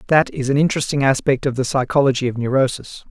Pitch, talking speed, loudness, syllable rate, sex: 135 Hz, 195 wpm, -18 LUFS, 6.6 syllables/s, male